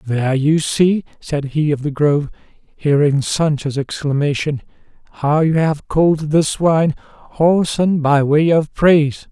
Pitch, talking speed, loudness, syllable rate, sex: 150 Hz, 140 wpm, -16 LUFS, 4.2 syllables/s, male